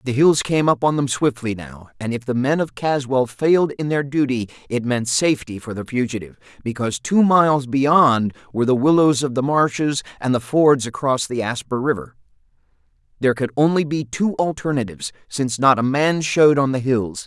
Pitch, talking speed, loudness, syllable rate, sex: 130 Hz, 190 wpm, -19 LUFS, 5.4 syllables/s, male